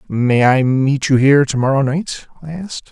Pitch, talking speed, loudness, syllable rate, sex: 140 Hz, 205 wpm, -14 LUFS, 5.1 syllables/s, male